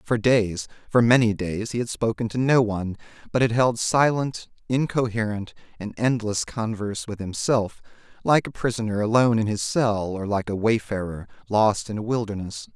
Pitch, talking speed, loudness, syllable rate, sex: 110 Hz, 170 wpm, -23 LUFS, 5.0 syllables/s, male